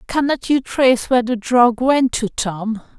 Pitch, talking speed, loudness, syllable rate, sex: 245 Hz, 180 wpm, -17 LUFS, 4.4 syllables/s, female